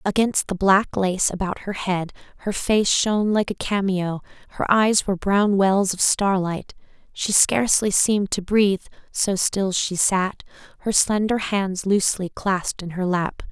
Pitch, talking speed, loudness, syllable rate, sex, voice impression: 195 Hz, 165 wpm, -21 LUFS, 4.4 syllables/s, female, feminine, adult-like, tensed, powerful, slightly hard, clear, fluent, intellectual, slightly friendly, elegant, lively, intense, sharp